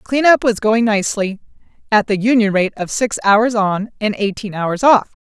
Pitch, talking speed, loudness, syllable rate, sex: 215 Hz, 185 wpm, -16 LUFS, 4.7 syllables/s, female